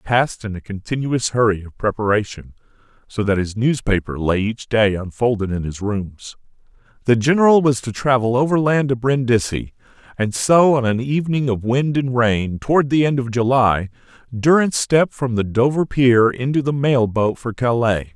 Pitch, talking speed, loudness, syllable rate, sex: 120 Hz, 175 wpm, -18 LUFS, 5.1 syllables/s, male